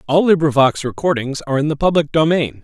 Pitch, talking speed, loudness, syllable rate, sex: 150 Hz, 180 wpm, -16 LUFS, 6.1 syllables/s, male